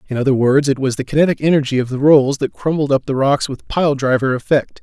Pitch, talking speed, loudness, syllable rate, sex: 140 Hz, 250 wpm, -16 LUFS, 6.0 syllables/s, male